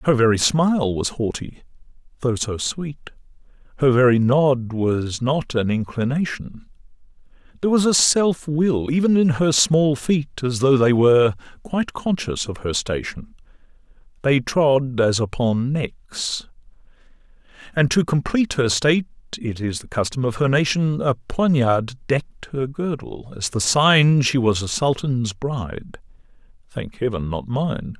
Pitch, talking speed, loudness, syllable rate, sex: 130 Hz, 145 wpm, -20 LUFS, 3.9 syllables/s, male